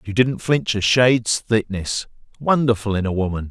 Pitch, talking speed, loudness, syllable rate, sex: 110 Hz, 170 wpm, -19 LUFS, 4.8 syllables/s, male